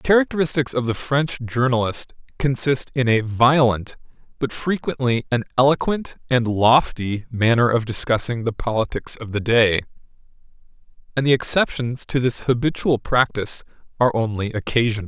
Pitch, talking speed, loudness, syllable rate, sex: 125 Hz, 135 wpm, -20 LUFS, 5.1 syllables/s, male